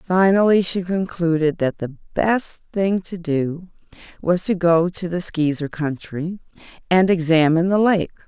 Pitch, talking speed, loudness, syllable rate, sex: 175 Hz, 145 wpm, -20 LUFS, 4.3 syllables/s, female